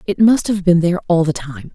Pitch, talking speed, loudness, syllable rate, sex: 175 Hz, 275 wpm, -15 LUFS, 5.8 syllables/s, female